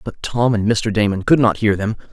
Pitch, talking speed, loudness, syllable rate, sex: 110 Hz, 255 wpm, -17 LUFS, 5.3 syllables/s, male